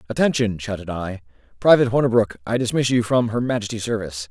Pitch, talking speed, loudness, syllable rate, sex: 110 Hz, 165 wpm, -20 LUFS, 6.5 syllables/s, male